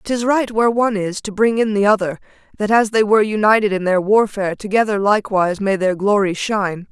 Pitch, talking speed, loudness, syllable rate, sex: 205 Hz, 210 wpm, -17 LUFS, 6.1 syllables/s, female